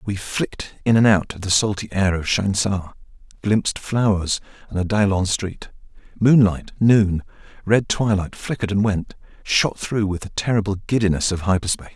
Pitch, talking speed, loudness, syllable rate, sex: 100 Hz, 160 wpm, -20 LUFS, 5.0 syllables/s, male